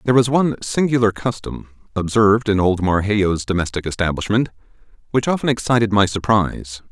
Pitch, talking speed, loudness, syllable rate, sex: 105 Hz, 140 wpm, -18 LUFS, 5.8 syllables/s, male